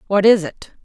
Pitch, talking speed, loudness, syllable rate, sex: 200 Hz, 215 wpm, -15 LUFS, 4.9 syllables/s, female